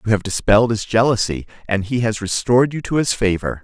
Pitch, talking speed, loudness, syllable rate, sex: 110 Hz, 215 wpm, -18 LUFS, 6.1 syllables/s, male